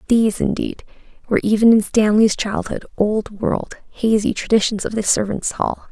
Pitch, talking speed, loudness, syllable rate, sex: 215 Hz, 150 wpm, -18 LUFS, 5.0 syllables/s, female